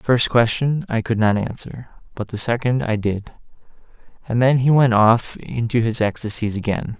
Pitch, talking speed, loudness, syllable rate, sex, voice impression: 115 Hz, 180 wpm, -19 LUFS, 4.8 syllables/s, male, masculine, adult-like, slightly relaxed, weak, dark, clear, cool, sincere, calm, friendly, kind, modest